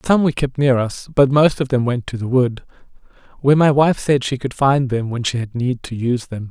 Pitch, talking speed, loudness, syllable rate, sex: 130 Hz, 260 wpm, -18 LUFS, 5.4 syllables/s, male